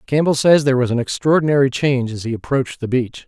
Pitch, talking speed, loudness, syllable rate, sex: 135 Hz, 220 wpm, -17 LUFS, 6.7 syllables/s, male